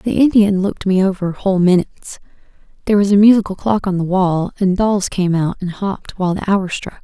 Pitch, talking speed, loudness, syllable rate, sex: 190 Hz, 205 wpm, -16 LUFS, 5.8 syllables/s, female